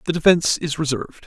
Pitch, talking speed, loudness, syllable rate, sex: 155 Hz, 190 wpm, -19 LUFS, 7.1 syllables/s, male